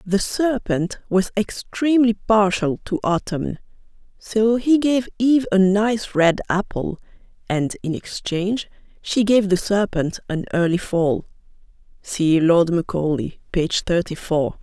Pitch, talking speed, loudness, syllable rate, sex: 195 Hz, 125 wpm, -20 LUFS, 3.4 syllables/s, female